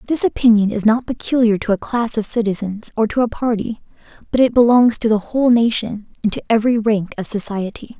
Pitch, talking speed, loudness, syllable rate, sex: 225 Hz, 205 wpm, -17 LUFS, 5.8 syllables/s, female